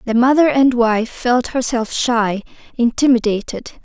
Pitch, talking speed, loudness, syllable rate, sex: 240 Hz, 125 wpm, -16 LUFS, 4.3 syllables/s, female